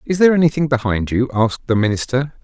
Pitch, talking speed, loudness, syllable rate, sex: 130 Hz, 195 wpm, -17 LUFS, 6.8 syllables/s, male